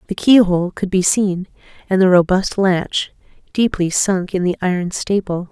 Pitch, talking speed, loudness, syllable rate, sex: 185 Hz, 165 wpm, -17 LUFS, 4.7 syllables/s, female